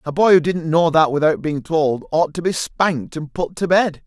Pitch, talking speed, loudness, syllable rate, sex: 160 Hz, 250 wpm, -18 LUFS, 4.9 syllables/s, male